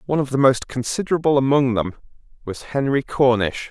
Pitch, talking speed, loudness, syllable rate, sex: 130 Hz, 160 wpm, -19 LUFS, 5.8 syllables/s, male